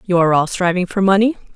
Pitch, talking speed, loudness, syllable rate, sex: 185 Hz, 230 wpm, -16 LUFS, 6.9 syllables/s, female